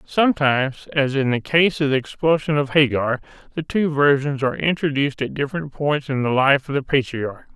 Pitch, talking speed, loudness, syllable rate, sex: 140 Hz, 190 wpm, -20 LUFS, 5.4 syllables/s, male